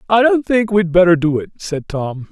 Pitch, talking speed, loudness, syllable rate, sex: 175 Hz, 235 wpm, -15 LUFS, 4.9 syllables/s, male